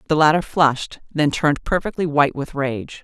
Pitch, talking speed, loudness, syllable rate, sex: 150 Hz, 180 wpm, -19 LUFS, 5.5 syllables/s, female